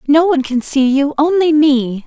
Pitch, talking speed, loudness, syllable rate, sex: 285 Hz, 205 wpm, -13 LUFS, 4.8 syllables/s, female